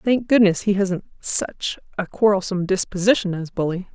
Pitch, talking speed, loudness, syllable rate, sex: 195 Hz, 150 wpm, -21 LUFS, 5.2 syllables/s, female